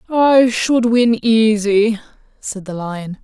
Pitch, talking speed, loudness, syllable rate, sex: 220 Hz, 130 wpm, -15 LUFS, 3.1 syllables/s, female